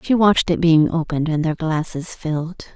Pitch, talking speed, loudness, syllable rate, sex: 165 Hz, 195 wpm, -19 LUFS, 5.5 syllables/s, female